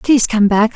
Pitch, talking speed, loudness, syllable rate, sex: 225 Hz, 240 wpm, -13 LUFS, 5.3 syllables/s, female